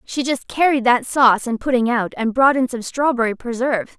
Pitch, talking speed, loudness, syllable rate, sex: 250 Hz, 210 wpm, -18 LUFS, 5.4 syllables/s, female